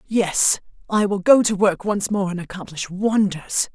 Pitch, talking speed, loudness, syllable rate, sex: 195 Hz, 175 wpm, -20 LUFS, 4.3 syllables/s, female